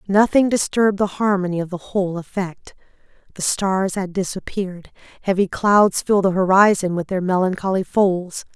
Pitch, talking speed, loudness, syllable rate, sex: 190 Hz, 145 wpm, -19 LUFS, 5.1 syllables/s, female